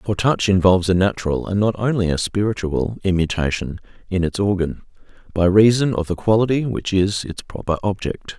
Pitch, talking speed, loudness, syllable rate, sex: 95 Hz, 170 wpm, -19 LUFS, 5.4 syllables/s, male